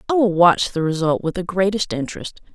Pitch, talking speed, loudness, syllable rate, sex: 185 Hz, 210 wpm, -19 LUFS, 5.8 syllables/s, female